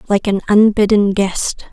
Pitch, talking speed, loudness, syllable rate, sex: 205 Hz, 140 wpm, -14 LUFS, 4.2 syllables/s, female